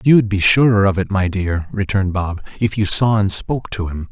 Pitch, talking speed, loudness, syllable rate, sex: 100 Hz, 250 wpm, -17 LUFS, 5.5 syllables/s, male